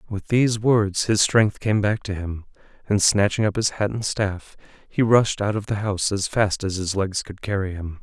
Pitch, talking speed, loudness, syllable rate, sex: 100 Hz, 225 wpm, -22 LUFS, 4.8 syllables/s, male